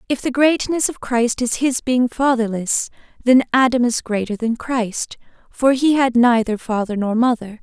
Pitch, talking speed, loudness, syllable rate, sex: 245 Hz, 175 wpm, -18 LUFS, 4.4 syllables/s, female